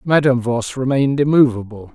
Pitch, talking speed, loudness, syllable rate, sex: 130 Hz, 125 wpm, -16 LUFS, 6.0 syllables/s, male